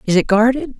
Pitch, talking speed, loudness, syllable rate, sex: 225 Hz, 225 wpm, -15 LUFS, 5.8 syllables/s, female